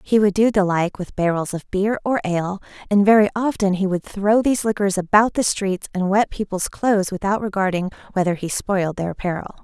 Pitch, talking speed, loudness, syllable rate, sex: 195 Hz, 205 wpm, -20 LUFS, 5.7 syllables/s, female